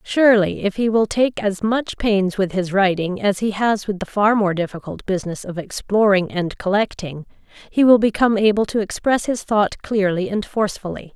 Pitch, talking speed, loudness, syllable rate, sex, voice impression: 205 Hz, 190 wpm, -19 LUFS, 5.1 syllables/s, female, very feminine, adult-like, slightly middle-aged, slightly thin, tensed, slightly powerful, slightly bright, hard, very clear, fluent, slightly raspy, slightly cool, intellectual, slightly refreshing, very sincere, slightly calm, slightly friendly, slightly reassuring, slightly unique, elegant, slightly wild, slightly sweet, slightly lively, slightly kind, strict, intense, slightly sharp, slightly modest